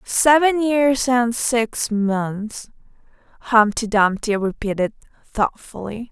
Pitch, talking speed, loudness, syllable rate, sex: 230 Hz, 90 wpm, -19 LUFS, 3.3 syllables/s, female